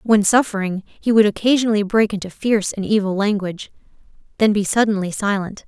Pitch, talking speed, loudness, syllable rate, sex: 205 Hz, 160 wpm, -18 LUFS, 6.0 syllables/s, female